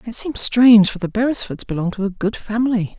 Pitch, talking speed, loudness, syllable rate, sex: 215 Hz, 220 wpm, -17 LUFS, 5.9 syllables/s, female